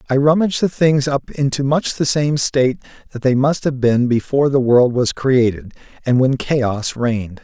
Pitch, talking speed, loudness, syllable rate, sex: 130 Hz, 195 wpm, -16 LUFS, 4.9 syllables/s, male